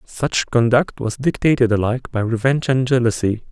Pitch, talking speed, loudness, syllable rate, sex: 120 Hz, 155 wpm, -18 LUFS, 5.3 syllables/s, male